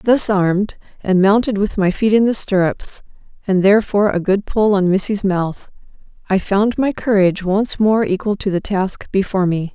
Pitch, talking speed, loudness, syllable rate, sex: 200 Hz, 185 wpm, -16 LUFS, 5.0 syllables/s, female